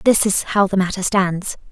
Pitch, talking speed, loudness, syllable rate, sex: 190 Hz, 210 wpm, -18 LUFS, 4.7 syllables/s, female